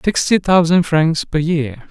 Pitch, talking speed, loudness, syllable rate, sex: 160 Hz, 155 wpm, -15 LUFS, 3.9 syllables/s, male